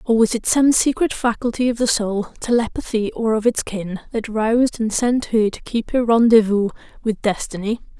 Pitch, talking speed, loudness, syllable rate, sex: 225 Hz, 190 wpm, -19 LUFS, 5.0 syllables/s, female